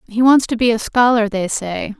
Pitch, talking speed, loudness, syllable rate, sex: 225 Hz, 240 wpm, -16 LUFS, 4.9 syllables/s, female